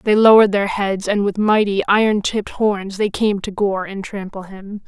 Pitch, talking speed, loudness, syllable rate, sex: 200 Hz, 210 wpm, -17 LUFS, 4.8 syllables/s, female